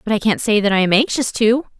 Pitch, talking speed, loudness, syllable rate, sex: 220 Hz, 300 wpm, -16 LUFS, 6.4 syllables/s, female